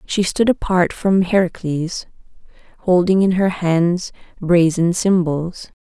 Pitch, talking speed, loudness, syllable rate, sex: 180 Hz, 115 wpm, -17 LUFS, 3.7 syllables/s, female